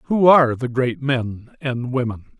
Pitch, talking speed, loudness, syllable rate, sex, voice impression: 130 Hz, 175 wpm, -19 LUFS, 4.1 syllables/s, male, very masculine, very adult-like, old, very thick, tensed, powerful, bright, hard, muffled, fluent, raspy, very cool, intellectual, sincere, calm, very mature, slightly friendly, slightly reassuring, slightly unique, very wild, slightly lively, strict, slightly sharp